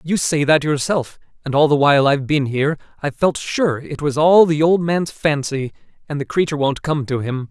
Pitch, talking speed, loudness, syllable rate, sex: 150 Hz, 225 wpm, -18 LUFS, 5.5 syllables/s, male